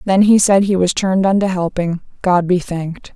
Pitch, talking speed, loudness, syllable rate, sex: 185 Hz, 210 wpm, -15 LUFS, 5.3 syllables/s, female